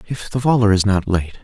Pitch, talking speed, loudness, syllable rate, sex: 105 Hz, 250 wpm, -17 LUFS, 5.7 syllables/s, male